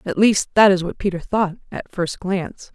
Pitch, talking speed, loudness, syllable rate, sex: 190 Hz, 220 wpm, -19 LUFS, 5.0 syllables/s, female